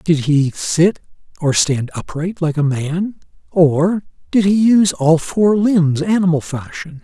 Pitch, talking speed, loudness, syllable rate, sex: 170 Hz, 155 wpm, -16 LUFS, 3.9 syllables/s, male